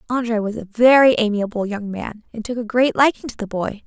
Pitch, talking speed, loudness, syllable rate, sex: 225 Hz, 235 wpm, -18 LUFS, 5.6 syllables/s, female